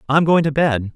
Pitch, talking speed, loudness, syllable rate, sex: 145 Hz, 255 wpm, -17 LUFS, 5.2 syllables/s, male